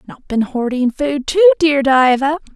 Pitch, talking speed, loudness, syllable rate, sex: 280 Hz, 165 wpm, -15 LUFS, 4.4 syllables/s, female